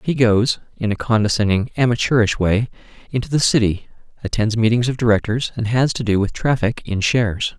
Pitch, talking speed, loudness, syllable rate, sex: 115 Hz, 175 wpm, -18 LUFS, 5.6 syllables/s, male